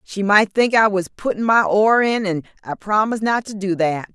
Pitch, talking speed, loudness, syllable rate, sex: 205 Hz, 230 wpm, -18 LUFS, 5.1 syllables/s, female